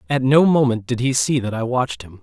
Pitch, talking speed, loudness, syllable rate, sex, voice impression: 125 Hz, 270 wpm, -18 LUFS, 5.9 syllables/s, male, masculine, adult-like, tensed, powerful, slightly muffled, raspy, cool, intellectual, slightly mature, friendly, wild, lively, slightly strict, slightly intense